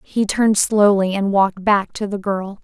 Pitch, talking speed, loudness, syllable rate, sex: 200 Hz, 205 wpm, -17 LUFS, 4.8 syllables/s, female